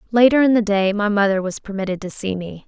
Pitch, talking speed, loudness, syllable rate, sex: 205 Hz, 245 wpm, -19 LUFS, 6.2 syllables/s, female